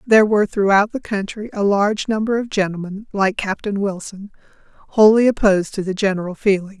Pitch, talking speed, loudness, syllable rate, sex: 205 Hz, 170 wpm, -18 LUFS, 5.8 syllables/s, female